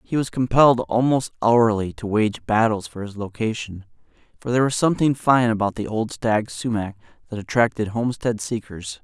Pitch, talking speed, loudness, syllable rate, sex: 115 Hz, 165 wpm, -21 LUFS, 5.3 syllables/s, male